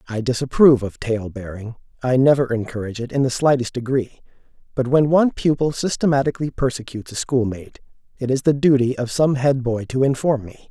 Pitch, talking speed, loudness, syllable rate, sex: 130 Hz, 180 wpm, -20 LUFS, 6.0 syllables/s, male